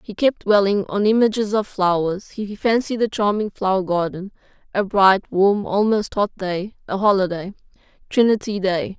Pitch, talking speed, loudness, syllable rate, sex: 200 Hz, 145 wpm, -20 LUFS, 4.7 syllables/s, female